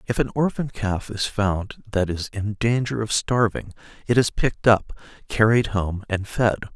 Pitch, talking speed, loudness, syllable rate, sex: 110 Hz, 180 wpm, -22 LUFS, 4.4 syllables/s, male